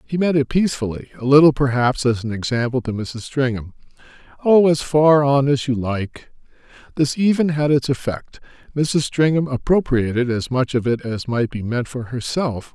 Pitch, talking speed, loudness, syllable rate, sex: 135 Hz, 175 wpm, -19 LUFS, 4.9 syllables/s, male